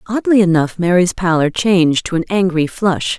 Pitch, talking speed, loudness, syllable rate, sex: 180 Hz, 170 wpm, -15 LUFS, 5.0 syllables/s, female